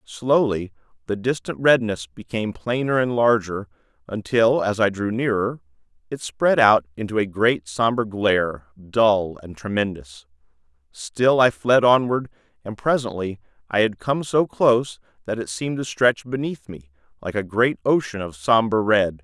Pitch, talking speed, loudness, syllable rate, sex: 110 Hz, 150 wpm, -21 LUFS, 4.5 syllables/s, male